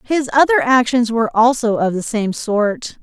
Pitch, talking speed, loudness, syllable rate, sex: 235 Hz, 180 wpm, -16 LUFS, 4.6 syllables/s, female